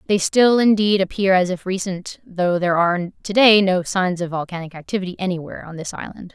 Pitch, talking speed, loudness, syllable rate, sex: 185 Hz, 200 wpm, -19 LUFS, 5.8 syllables/s, female